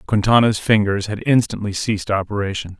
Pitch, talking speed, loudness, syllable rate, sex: 105 Hz, 130 wpm, -18 LUFS, 5.7 syllables/s, male